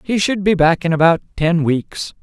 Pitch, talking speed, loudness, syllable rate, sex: 170 Hz, 215 wpm, -16 LUFS, 4.7 syllables/s, male